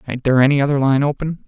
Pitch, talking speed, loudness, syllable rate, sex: 140 Hz, 245 wpm, -16 LUFS, 7.6 syllables/s, male